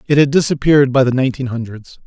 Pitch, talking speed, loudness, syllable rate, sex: 135 Hz, 205 wpm, -14 LUFS, 6.8 syllables/s, male